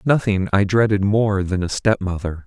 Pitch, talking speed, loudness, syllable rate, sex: 100 Hz, 195 wpm, -19 LUFS, 4.9 syllables/s, male